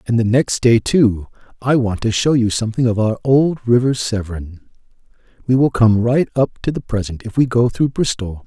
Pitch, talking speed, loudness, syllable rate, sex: 115 Hz, 205 wpm, -17 LUFS, 4.9 syllables/s, male